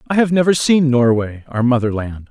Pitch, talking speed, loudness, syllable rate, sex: 130 Hz, 210 wpm, -16 LUFS, 5.1 syllables/s, male